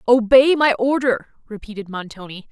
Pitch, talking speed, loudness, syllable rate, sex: 230 Hz, 120 wpm, -16 LUFS, 4.9 syllables/s, female